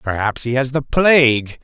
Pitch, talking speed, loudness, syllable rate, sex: 130 Hz, 185 wpm, -15 LUFS, 4.6 syllables/s, male